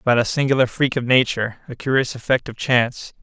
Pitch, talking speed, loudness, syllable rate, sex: 125 Hz, 205 wpm, -19 LUFS, 6.3 syllables/s, male